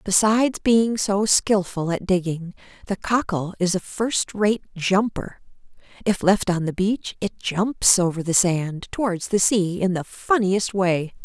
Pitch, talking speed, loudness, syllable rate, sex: 195 Hz, 160 wpm, -21 LUFS, 4.0 syllables/s, female